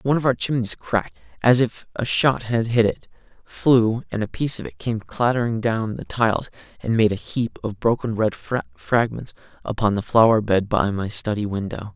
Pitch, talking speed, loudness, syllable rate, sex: 115 Hz, 195 wpm, -21 LUFS, 4.9 syllables/s, male